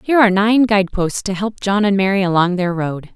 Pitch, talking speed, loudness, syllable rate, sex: 195 Hz, 230 wpm, -16 LUFS, 5.9 syllables/s, female